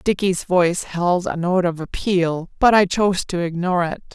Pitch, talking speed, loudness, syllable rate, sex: 180 Hz, 190 wpm, -19 LUFS, 4.8 syllables/s, female